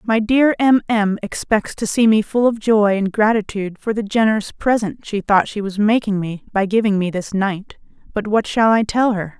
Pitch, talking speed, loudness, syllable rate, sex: 210 Hz, 215 wpm, -18 LUFS, 5.0 syllables/s, female